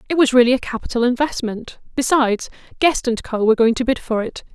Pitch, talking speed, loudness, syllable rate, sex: 245 Hz, 210 wpm, -18 LUFS, 6.3 syllables/s, female